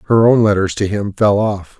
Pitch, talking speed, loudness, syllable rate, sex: 105 Hz, 235 wpm, -14 LUFS, 5.0 syllables/s, male